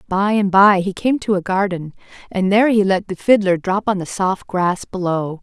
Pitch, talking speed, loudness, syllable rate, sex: 195 Hz, 220 wpm, -17 LUFS, 5.0 syllables/s, female